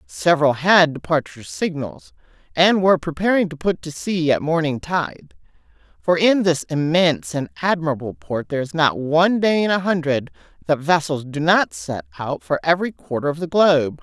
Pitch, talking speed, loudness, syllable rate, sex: 165 Hz, 175 wpm, -19 LUFS, 5.3 syllables/s, female